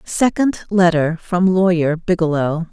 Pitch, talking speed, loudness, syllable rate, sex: 175 Hz, 110 wpm, -17 LUFS, 4.0 syllables/s, female